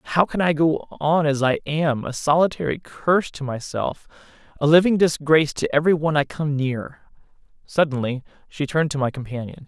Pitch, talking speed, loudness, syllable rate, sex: 150 Hz, 165 wpm, -21 LUFS, 5.3 syllables/s, male